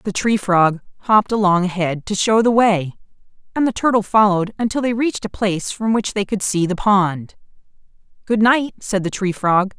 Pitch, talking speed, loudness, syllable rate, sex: 200 Hz, 195 wpm, -18 LUFS, 5.2 syllables/s, female